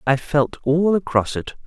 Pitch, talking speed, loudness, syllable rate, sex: 150 Hz, 180 wpm, -20 LUFS, 4.2 syllables/s, male